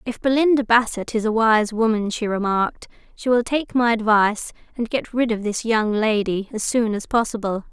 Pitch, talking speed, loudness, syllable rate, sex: 225 Hz, 195 wpm, -20 LUFS, 5.1 syllables/s, female